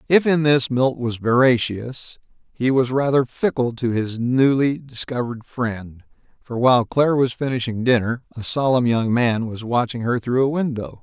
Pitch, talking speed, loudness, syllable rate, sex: 125 Hz, 170 wpm, -20 LUFS, 4.7 syllables/s, male